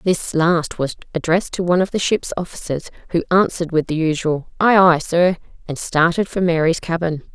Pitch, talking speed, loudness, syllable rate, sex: 170 Hz, 190 wpm, -18 LUFS, 5.4 syllables/s, female